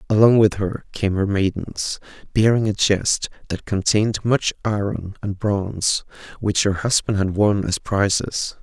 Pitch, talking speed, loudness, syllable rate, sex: 100 Hz, 155 wpm, -20 LUFS, 4.3 syllables/s, male